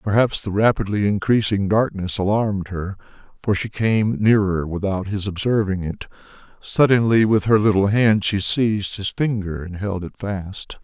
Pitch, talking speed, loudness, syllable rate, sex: 100 Hz, 155 wpm, -20 LUFS, 4.6 syllables/s, male